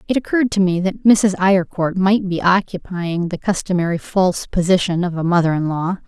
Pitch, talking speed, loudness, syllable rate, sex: 180 Hz, 190 wpm, -17 LUFS, 5.5 syllables/s, female